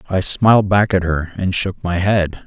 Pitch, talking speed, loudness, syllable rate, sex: 95 Hz, 220 wpm, -16 LUFS, 4.6 syllables/s, male